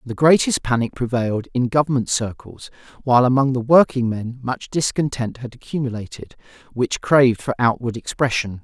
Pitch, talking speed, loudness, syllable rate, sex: 125 Hz, 140 wpm, -19 LUFS, 5.4 syllables/s, male